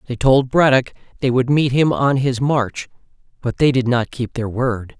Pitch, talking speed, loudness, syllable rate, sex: 125 Hz, 215 wpm, -17 LUFS, 4.5 syllables/s, male